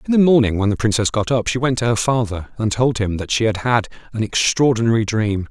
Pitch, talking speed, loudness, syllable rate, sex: 115 Hz, 250 wpm, -18 LUFS, 5.9 syllables/s, male